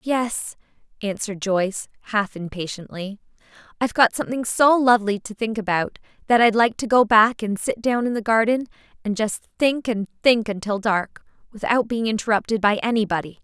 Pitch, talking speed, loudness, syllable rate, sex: 220 Hz, 165 wpm, -21 LUFS, 5.3 syllables/s, female